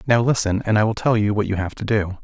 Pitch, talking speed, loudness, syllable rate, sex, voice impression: 105 Hz, 320 wpm, -20 LUFS, 6.3 syllables/s, male, masculine, adult-like, tensed, powerful, clear, fluent, cool, intellectual, calm, wild, lively, slightly sharp, modest